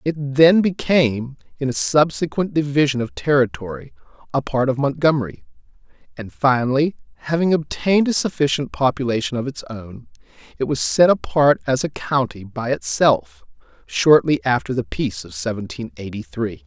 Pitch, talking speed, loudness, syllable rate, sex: 125 Hz, 145 wpm, -19 LUFS, 5.1 syllables/s, male